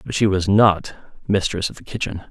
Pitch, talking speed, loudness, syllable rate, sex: 95 Hz, 210 wpm, -19 LUFS, 4.8 syllables/s, male